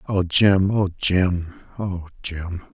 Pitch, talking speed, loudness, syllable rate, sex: 90 Hz, 85 wpm, -21 LUFS, 3.1 syllables/s, male